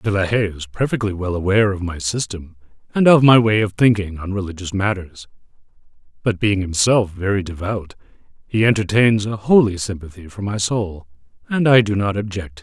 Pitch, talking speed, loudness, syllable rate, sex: 100 Hz, 185 wpm, -18 LUFS, 5.5 syllables/s, male